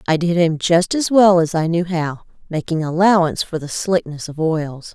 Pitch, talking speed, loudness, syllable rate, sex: 170 Hz, 205 wpm, -17 LUFS, 4.9 syllables/s, female